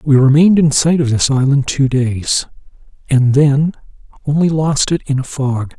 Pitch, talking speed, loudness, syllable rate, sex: 140 Hz, 175 wpm, -14 LUFS, 4.6 syllables/s, male